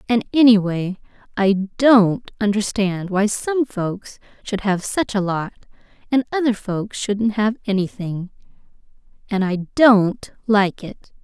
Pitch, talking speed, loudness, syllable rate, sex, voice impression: 210 Hz, 130 wpm, -19 LUFS, 3.8 syllables/s, female, feminine, adult-like, tensed, bright, clear, fluent, intellectual, calm, friendly, reassuring, elegant, lively, slightly kind